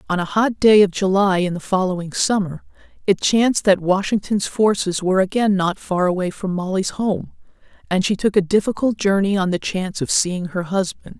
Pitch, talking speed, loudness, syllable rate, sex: 190 Hz, 195 wpm, -19 LUFS, 5.3 syllables/s, female